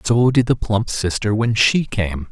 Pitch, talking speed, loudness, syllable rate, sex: 110 Hz, 205 wpm, -18 LUFS, 4.1 syllables/s, male